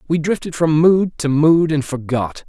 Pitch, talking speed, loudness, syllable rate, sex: 155 Hz, 195 wpm, -16 LUFS, 4.4 syllables/s, male